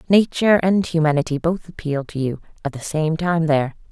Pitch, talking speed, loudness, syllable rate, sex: 160 Hz, 185 wpm, -20 LUFS, 5.6 syllables/s, female